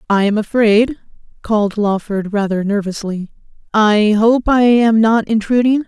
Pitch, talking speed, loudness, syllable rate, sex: 215 Hz, 120 wpm, -14 LUFS, 4.4 syllables/s, female